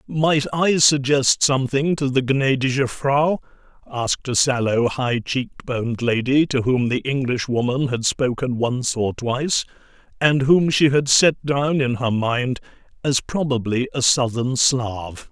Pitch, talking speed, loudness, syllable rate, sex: 130 Hz, 150 wpm, -20 LUFS, 4.1 syllables/s, male